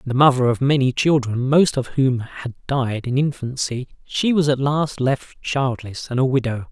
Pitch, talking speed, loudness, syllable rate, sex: 130 Hz, 190 wpm, -20 LUFS, 4.6 syllables/s, male